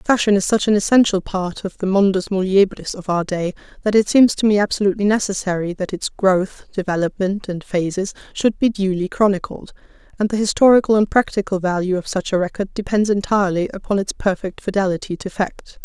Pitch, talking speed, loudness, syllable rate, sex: 195 Hz, 180 wpm, -19 LUFS, 5.7 syllables/s, female